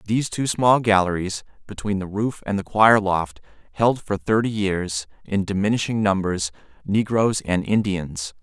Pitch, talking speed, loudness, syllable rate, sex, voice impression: 100 Hz, 150 wpm, -21 LUFS, 4.5 syllables/s, male, masculine, adult-like, tensed, powerful, bright, clear, fluent, cool, calm, wild, lively, slightly kind